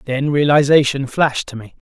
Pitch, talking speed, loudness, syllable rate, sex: 140 Hz, 155 wpm, -15 LUFS, 5.5 syllables/s, male